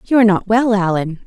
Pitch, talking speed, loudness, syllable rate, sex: 205 Hz, 235 wpm, -15 LUFS, 6.1 syllables/s, female